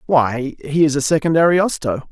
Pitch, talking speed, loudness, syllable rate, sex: 145 Hz, 170 wpm, -17 LUFS, 5.0 syllables/s, male